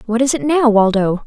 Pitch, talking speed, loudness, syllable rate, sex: 230 Hz, 235 wpm, -14 LUFS, 5.4 syllables/s, female